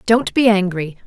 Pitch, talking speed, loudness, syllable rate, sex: 205 Hz, 170 wpm, -16 LUFS, 4.6 syllables/s, female